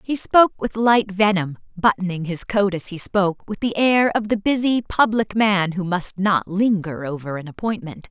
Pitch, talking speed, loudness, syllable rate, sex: 200 Hz, 190 wpm, -20 LUFS, 4.8 syllables/s, female